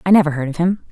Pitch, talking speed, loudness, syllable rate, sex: 165 Hz, 330 wpm, -17 LUFS, 7.8 syllables/s, female